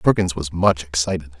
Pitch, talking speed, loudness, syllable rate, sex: 85 Hz, 170 wpm, -20 LUFS, 5.5 syllables/s, male